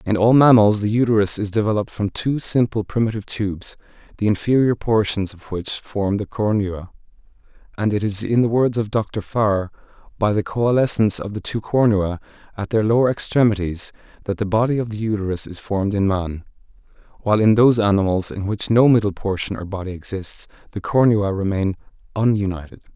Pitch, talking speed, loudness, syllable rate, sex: 105 Hz, 175 wpm, -19 LUFS, 5.7 syllables/s, male